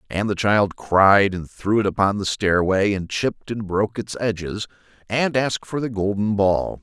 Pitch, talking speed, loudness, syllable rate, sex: 100 Hz, 195 wpm, -21 LUFS, 4.7 syllables/s, male